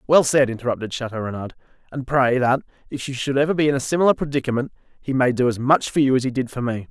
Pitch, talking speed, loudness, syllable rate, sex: 130 Hz, 250 wpm, -21 LUFS, 7.0 syllables/s, male